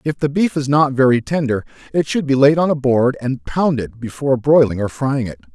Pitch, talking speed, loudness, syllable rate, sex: 135 Hz, 225 wpm, -17 LUFS, 5.4 syllables/s, male